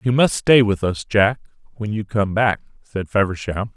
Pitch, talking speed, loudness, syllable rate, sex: 105 Hz, 190 wpm, -19 LUFS, 4.6 syllables/s, male